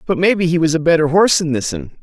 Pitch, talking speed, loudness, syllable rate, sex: 160 Hz, 265 wpm, -15 LUFS, 6.5 syllables/s, male